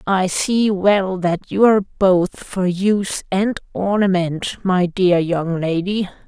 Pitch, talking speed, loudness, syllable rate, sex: 190 Hz, 145 wpm, -18 LUFS, 3.5 syllables/s, female